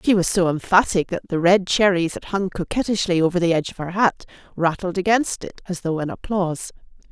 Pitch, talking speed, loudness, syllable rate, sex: 185 Hz, 200 wpm, -21 LUFS, 5.8 syllables/s, female